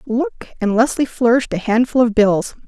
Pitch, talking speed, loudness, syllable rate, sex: 235 Hz, 180 wpm, -17 LUFS, 5.6 syllables/s, female